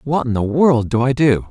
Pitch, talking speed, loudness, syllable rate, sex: 130 Hz, 280 wpm, -16 LUFS, 5.0 syllables/s, male